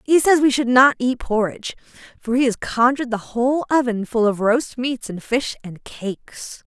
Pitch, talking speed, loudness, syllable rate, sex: 240 Hz, 195 wpm, -19 LUFS, 4.8 syllables/s, female